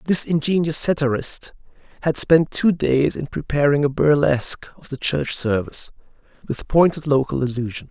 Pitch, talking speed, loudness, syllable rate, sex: 145 Hz, 145 wpm, -20 LUFS, 5.0 syllables/s, male